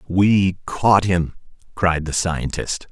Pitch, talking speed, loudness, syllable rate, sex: 90 Hz, 125 wpm, -19 LUFS, 3.1 syllables/s, male